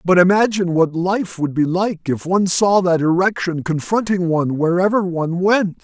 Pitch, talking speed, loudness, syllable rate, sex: 180 Hz, 175 wpm, -17 LUFS, 5.1 syllables/s, male